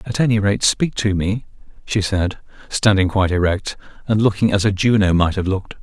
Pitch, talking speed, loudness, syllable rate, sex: 100 Hz, 195 wpm, -18 LUFS, 5.5 syllables/s, male